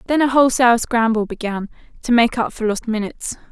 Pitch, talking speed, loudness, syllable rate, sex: 235 Hz, 190 wpm, -18 LUFS, 6.2 syllables/s, female